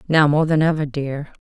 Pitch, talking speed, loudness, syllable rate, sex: 150 Hz, 210 wpm, -19 LUFS, 5.1 syllables/s, female